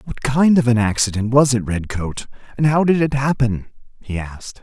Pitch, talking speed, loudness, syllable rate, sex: 125 Hz, 195 wpm, -18 LUFS, 5.2 syllables/s, male